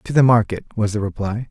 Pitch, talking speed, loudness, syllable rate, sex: 110 Hz, 240 wpm, -19 LUFS, 6.1 syllables/s, male